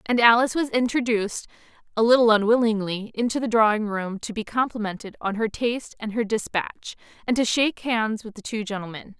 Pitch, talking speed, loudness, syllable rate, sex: 220 Hz, 185 wpm, -23 LUFS, 5.8 syllables/s, female